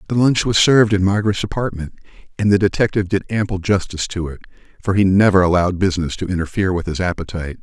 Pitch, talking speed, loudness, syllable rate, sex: 95 Hz, 195 wpm, -17 LUFS, 7.2 syllables/s, male